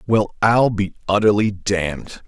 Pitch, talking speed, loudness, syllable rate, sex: 105 Hz, 130 wpm, -18 LUFS, 4.1 syllables/s, male